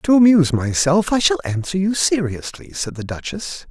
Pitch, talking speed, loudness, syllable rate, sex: 160 Hz, 180 wpm, -18 LUFS, 4.9 syllables/s, male